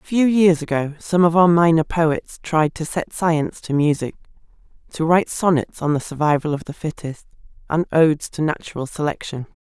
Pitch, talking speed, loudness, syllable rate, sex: 160 Hz, 180 wpm, -19 LUFS, 5.1 syllables/s, female